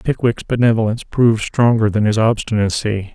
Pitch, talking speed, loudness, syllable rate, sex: 110 Hz, 135 wpm, -16 LUFS, 5.6 syllables/s, male